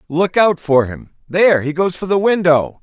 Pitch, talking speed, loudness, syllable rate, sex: 165 Hz, 190 wpm, -15 LUFS, 4.7 syllables/s, male